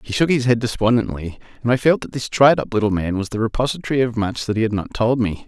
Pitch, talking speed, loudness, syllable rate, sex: 115 Hz, 275 wpm, -19 LUFS, 6.4 syllables/s, male